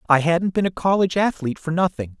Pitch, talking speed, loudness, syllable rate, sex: 170 Hz, 220 wpm, -20 LUFS, 6.5 syllables/s, male